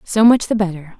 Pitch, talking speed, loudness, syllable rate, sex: 200 Hz, 240 wpm, -15 LUFS, 5.6 syllables/s, female